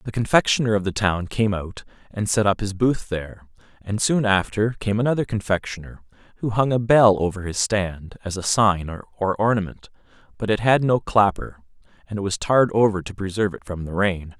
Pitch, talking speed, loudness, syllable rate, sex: 105 Hz, 195 wpm, -21 LUFS, 5.3 syllables/s, male